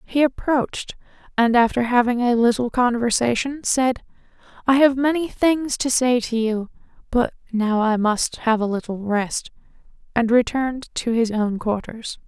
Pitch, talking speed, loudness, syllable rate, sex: 240 Hz, 150 wpm, -20 LUFS, 4.5 syllables/s, female